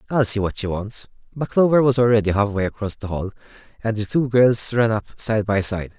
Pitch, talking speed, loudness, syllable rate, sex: 110 Hz, 220 wpm, -20 LUFS, 5.6 syllables/s, male